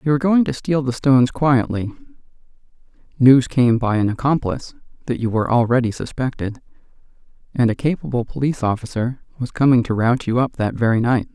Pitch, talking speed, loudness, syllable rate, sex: 125 Hz, 170 wpm, -19 LUFS, 6.0 syllables/s, male